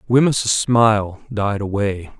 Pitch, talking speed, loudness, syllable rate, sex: 110 Hz, 110 wpm, -18 LUFS, 3.7 syllables/s, male